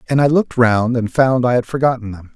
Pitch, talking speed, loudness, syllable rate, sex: 125 Hz, 255 wpm, -16 LUFS, 6.0 syllables/s, male